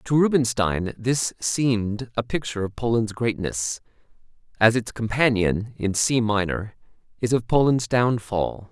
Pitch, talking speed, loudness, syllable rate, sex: 115 Hz, 130 wpm, -23 LUFS, 4.3 syllables/s, male